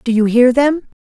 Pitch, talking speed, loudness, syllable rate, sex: 250 Hz, 235 wpm, -13 LUFS, 4.6 syllables/s, female